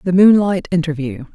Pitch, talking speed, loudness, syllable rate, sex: 170 Hz, 135 wpm, -15 LUFS, 5.1 syllables/s, female